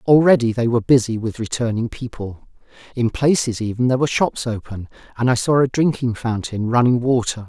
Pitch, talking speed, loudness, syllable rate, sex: 120 Hz, 175 wpm, -19 LUFS, 5.8 syllables/s, male